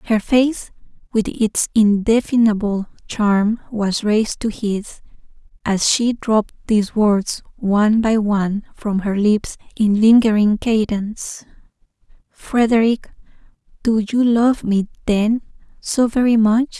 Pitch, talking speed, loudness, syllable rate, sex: 215 Hz, 115 wpm, -17 LUFS, 4.0 syllables/s, female